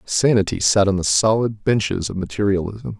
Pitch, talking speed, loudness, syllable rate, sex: 100 Hz, 160 wpm, -19 LUFS, 5.2 syllables/s, male